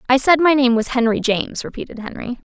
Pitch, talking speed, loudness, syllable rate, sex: 250 Hz, 215 wpm, -17 LUFS, 6.2 syllables/s, female